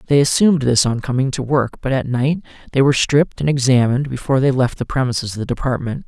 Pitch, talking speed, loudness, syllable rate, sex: 130 Hz, 225 wpm, -17 LUFS, 6.7 syllables/s, male